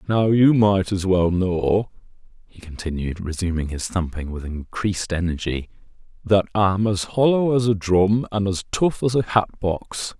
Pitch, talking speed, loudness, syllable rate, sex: 95 Hz, 165 wpm, -21 LUFS, 4.4 syllables/s, male